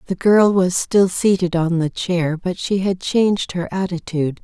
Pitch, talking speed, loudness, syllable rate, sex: 180 Hz, 190 wpm, -18 LUFS, 4.5 syllables/s, female